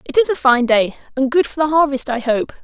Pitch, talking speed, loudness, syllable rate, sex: 275 Hz, 275 wpm, -16 LUFS, 5.7 syllables/s, female